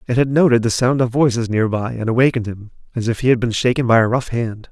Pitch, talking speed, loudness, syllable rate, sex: 120 Hz, 265 wpm, -17 LUFS, 6.5 syllables/s, male